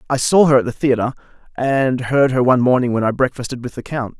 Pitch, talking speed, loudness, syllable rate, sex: 130 Hz, 245 wpm, -17 LUFS, 6.2 syllables/s, male